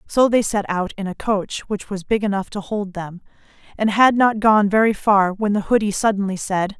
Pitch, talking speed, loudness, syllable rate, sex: 205 Hz, 220 wpm, -19 LUFS, 5.0 syllables/s, female